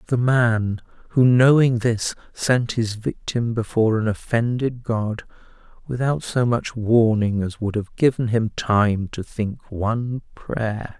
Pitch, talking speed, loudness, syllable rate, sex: 115 Hz, 140 wpm, -21 LUFS, 3.8 syllables/s, male